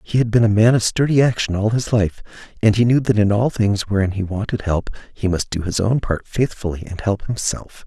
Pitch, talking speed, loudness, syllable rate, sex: 105 Hz, 245 wpm, -19 LUFS, 5.5 syllables/s, male